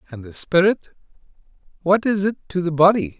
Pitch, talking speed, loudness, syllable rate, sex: 175 Hz, 150 wpm, -19 LUFS, 5.7 syllables/s, male